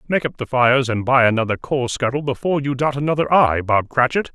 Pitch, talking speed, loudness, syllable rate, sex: 130 Hz, 220 wpm, -18 LUFS, 6.0 syllables/s, male